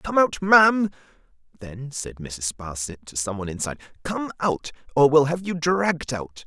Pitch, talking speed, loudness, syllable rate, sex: 140 Hz, 175 wpm, -23 LUFS, 5.0 syllables/s, male